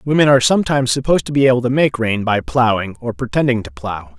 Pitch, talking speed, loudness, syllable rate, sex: 125 Hz, 230 wpm, -16 LUFS, 6.7 syllables/s, male